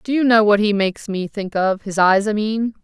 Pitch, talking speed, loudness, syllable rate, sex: 210 Hz, 255 wpm, -18 LUFS, 5.3 syllables/s, female